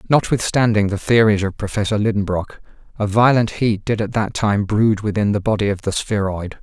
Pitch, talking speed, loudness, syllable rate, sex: 105 Hz, 180 wpm, -18 LUFS, 5.5 syllables/s, male